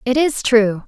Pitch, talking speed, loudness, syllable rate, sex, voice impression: 240 Hz, 205 wpm, -16 LUFS, 4.0 syllables/s, female, feminine, slightly adult-like, slightly soft, cute, calm, friendly, slightly sweet, kind